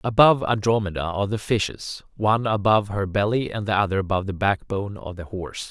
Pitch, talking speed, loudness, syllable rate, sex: 100 Hz, 190 wpm, -23 LUFS, 6.4 syllables/s, male